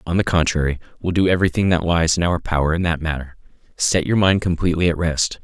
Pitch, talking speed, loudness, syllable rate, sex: 85 Hz, 220 wpm, -19 LUFS, 6.4 syllables/s, male